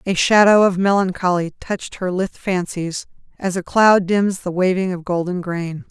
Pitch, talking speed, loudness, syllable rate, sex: 185 Hz, 175 wpm, -18 LUFS, 4.8 syllables/s, female